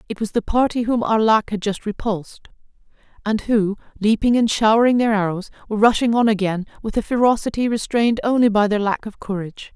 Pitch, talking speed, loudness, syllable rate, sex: 215 Hz, 185 wpm, -19 LUFS, 6.0 syllables/s, female